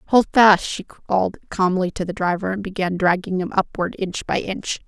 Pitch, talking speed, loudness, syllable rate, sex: 190 Hz, 195 wpm, -20 LUFS, 5.0 syllables/s, female